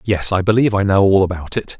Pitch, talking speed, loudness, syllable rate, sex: 100 Hz, 265 wpm, -16 LUFS, 6.5 syllables/s, male